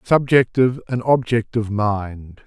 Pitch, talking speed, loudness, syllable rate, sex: 115 Hz, 95 wpm, -19 LUFS, 4.5 syllables/s, male